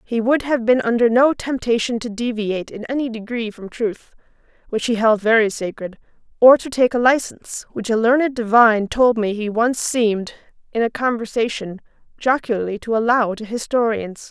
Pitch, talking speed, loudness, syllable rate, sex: 230 Hz, 170 wpm, -19 LUFS, 5.2 syllables/s, female